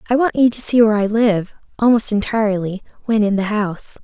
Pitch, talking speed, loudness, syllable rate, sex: 215 Hz, 210 wpm, -17 LUFS, 6.0 syllables/s, female